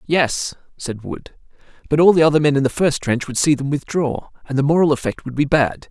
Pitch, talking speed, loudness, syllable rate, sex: 145 Hz, 235 wpm, -18 LUFS, 5.5 syllables/s, male